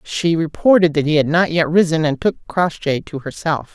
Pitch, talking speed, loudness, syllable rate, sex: 160 Hz, 210 wpm, -17 LUFS, 4.9 syllables/s, female